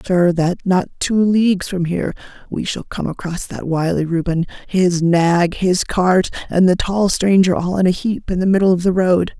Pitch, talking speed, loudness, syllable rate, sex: 180 Hz, 215 wpm, -17 LUFS, 4.8 syllables/s, female